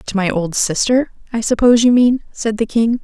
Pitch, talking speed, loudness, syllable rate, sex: 225 Hz, 215 wpm, -15 LUFS, 5.1 syllables/s, female